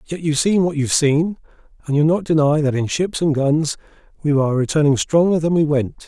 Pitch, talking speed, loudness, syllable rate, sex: 155 Hz, 215 wpm, -18 LUFS, 5.9 syllables/s, male